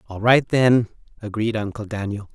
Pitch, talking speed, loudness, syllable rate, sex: 110 Hz, 155 wpm, -21 LUFS, 4.8 syllables/s, male